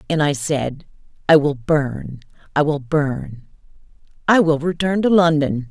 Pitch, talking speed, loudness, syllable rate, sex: 150 Hz, 145 wpm, -18 LUFS, 4.0 syllables/s, female